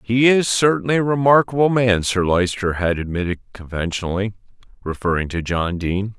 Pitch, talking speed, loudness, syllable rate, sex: 105 Hz, 145 wpm, -19 LUFS, 5.5 syllables/s, male